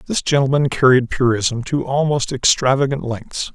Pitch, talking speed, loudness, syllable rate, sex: 130 Hz, 135 wpm, -17 LUFS, 4.8 syllables/s, male